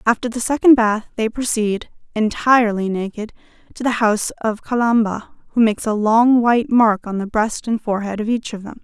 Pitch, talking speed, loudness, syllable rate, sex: 225 Hz, 190 wpm, -18 LUFS, 5.6 syllables/s, female